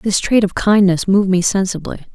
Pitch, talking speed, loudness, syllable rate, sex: 190 Hz, 195 wpm, -15 LUFS, 5.5 syllables/s, female